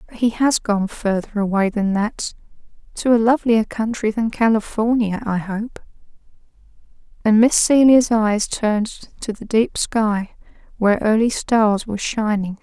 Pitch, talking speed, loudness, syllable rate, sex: 220 Hz, 140 wpm, -18 LUFS, 4.4 syllables/s, female